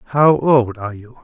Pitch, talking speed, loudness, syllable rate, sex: 125 Hz, 195 wpm, -15 LUFS, 5.3 syllables/s, male